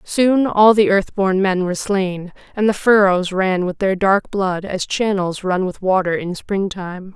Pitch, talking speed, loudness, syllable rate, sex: 190 Hz, 195 wpm, -17 LUFS, 4.3 syllables/s, female